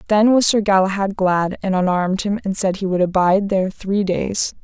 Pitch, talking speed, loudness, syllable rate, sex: 195 Hz, 205 wpm, -18 LUFS, 5.3 syllables/s, female